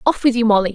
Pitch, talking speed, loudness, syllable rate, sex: 225 Hz, 325 wpm, -16 LUFS, 7.9 syllables/s, female